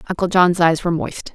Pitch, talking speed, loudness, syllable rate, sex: 175 Hz, 225 wpm, -17 LUFS, 6.0 syllables/s, female